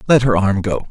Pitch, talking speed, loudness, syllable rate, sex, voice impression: 105 Hz, 265 wpm, -16 LUFS, 5.3 syllables/s, male, very masculine, very middle-aged, very thick, tensed, slightly powerful, bright, slightly soft, slightly muffled, fluent, raspy, cool, intellectual, slightly refreshing, sincere, calm, slightly friendly, reassuring, unique, slightly elegant, wild, lively, slightly strict, intense, slightly modest